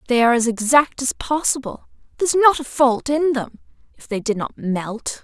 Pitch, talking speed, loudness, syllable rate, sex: 255 Hz, 205 wpm, -19 LUFS, 5.3 syllables/s, female